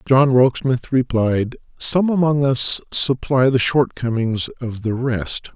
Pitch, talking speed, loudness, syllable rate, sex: 130 Hz, 140 wpm, -18 LUFS, 3.7 syllables/s, male